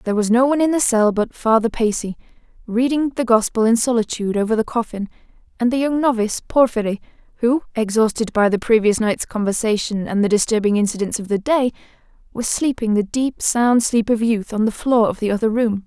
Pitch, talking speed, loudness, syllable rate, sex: 225 Hz, 195 wpm, -18 LUFS, 5.8 syllables/s, female